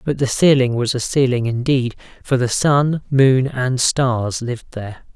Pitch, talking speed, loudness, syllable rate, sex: 130 Hz, 175 wpm, -17 LUFS, 4.3 syllables/s, male